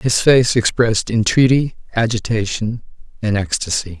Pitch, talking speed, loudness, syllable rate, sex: 110 Hz, 105 wpm, -17 LUFS, 4.7 syllables/s, male